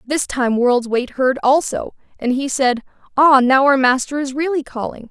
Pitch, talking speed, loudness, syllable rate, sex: 265 Hz, 190 wpm, -17 LUFS, 4.5 syllables/s, female